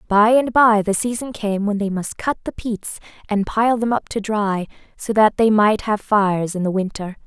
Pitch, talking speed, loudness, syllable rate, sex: 210 Hz, 225 wpm, -19 LUFS, 4.7 syllables/s, female